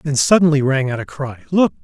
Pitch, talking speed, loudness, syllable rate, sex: 145 Hz, 230 wpm, -16 LUFS, 5.7 syllables/s, male